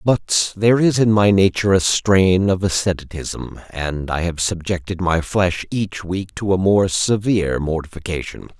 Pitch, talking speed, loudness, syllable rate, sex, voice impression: 95 Hz, 160 wpm, -18 LUFS, 4.5 syllables/s, male, masculine, adult-like, thick, fluent, cool, slightly refreshing, sincere